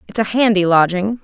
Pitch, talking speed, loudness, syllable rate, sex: 200 Hz, 195 wpm, -15 LUFS, 5.6 syllables/s, female